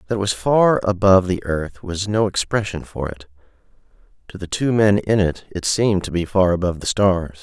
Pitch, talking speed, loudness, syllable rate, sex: 95 Hz, 210 wpm, -19 LUFS, 5.4 syllables/s, male